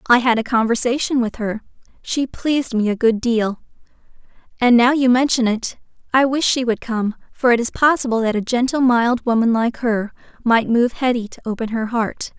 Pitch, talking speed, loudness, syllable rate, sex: 235 Hz, 190 wpm, -18 LUFS, 5.1 syllables/s, female